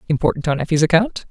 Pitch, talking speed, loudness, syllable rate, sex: 165 Hz, 185 wpm, -18 LUFS, 7.1 syllables/s, female